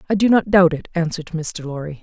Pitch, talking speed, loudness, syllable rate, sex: 170 Hz, 235 wpm, -19 LUFS, 6.2 syllables/s, female